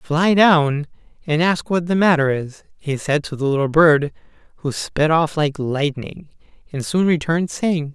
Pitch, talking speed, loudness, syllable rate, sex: 155 Hz, 175 wpm, -18 LUFS, 4.3 syllables/s, male